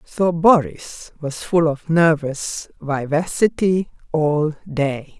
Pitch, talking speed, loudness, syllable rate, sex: 160 Hz, 105 wpm, -19 LUFS, 3.1 syllables/s, female